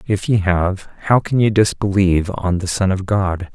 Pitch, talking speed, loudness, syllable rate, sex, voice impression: 95 Hz, 205 wpm, -17 LUFS, 4.4 syllables/s, male, masculine, adult-like, relaxed, soft, slightly muffled, cool, intellectual, calm, friendly, reassuring, wild, kind, slightly modest